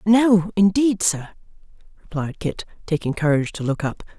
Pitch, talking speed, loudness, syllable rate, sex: 180 Hz, 145 wpm, -21 LUFS, 5.0 syllables/s, female